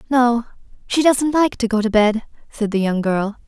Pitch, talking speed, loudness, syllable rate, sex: 230 Hz, 205 wpm, -18 LUFS, 4.7 syllables/s, female